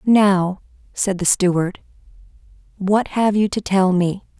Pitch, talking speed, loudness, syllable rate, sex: 195 Hz, 135 wpm, -18 LUFS, 3.8 syllables/s, female